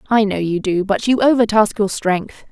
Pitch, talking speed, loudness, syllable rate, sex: 210 Hz, 215 wpm, -17 LUFS, 4.7 syllables/s, female